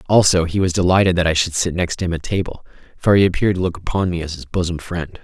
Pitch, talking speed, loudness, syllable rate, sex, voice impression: 90 Hz, 265 wpm, -18 LUFS, 6.6 syllables/s, male, masculine, adult-like, thick, tensed, powerful, hard, fluent, raspy, cool, calm, mature, reassuring, wild, slightly lively, strict